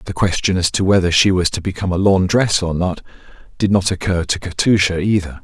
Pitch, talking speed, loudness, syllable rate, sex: 90 Hz, 210 wpm, -16 LUFS, 5.9 syllables/s, male